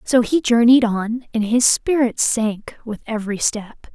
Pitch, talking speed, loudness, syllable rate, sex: 230 Hz, 165 wpm, -18 LUFS, 4.1 syllables/s, female